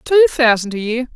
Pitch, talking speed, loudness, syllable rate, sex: 230 Hz, 210 wpm, -15 LUFS, 5.7 syllables/s, female